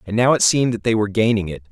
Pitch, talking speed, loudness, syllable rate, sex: 110 Hz, 315 wpm, -18 LUFS, 7.7 syllables/s, male